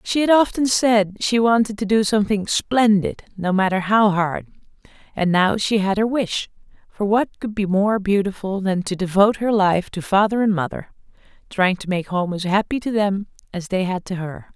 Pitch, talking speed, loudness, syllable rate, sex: 200 Hz, 200 wpm, -19 LUFS, 4.9 syllables/s, female